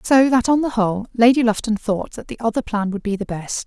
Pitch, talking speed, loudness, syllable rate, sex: 225 Hz, 260 wpm, -19 LUFS, 5.6 syllables/s, female